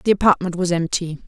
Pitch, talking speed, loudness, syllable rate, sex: 180 Hz, 190 wpm, -19 LUFS, 6.2 syllables/s, female